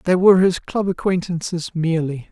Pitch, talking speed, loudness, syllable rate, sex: 175 Hz, 155 wpm, -19 LUFS, 5.6 syllables/s, male